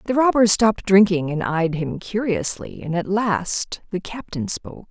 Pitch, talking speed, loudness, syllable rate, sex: 195 Hz, 170 wpm, -21 LUFS, 4.5 syllables/s, female